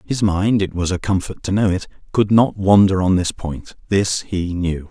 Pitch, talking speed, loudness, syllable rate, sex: 95 Hz, 195 wpm, -18 LUFS, 4.5 syllables/s, male